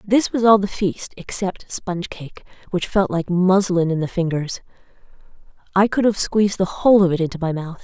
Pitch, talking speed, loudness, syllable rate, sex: 185 Hz, 200 wpm, -19 LUFS, 5.3 syllables/s, female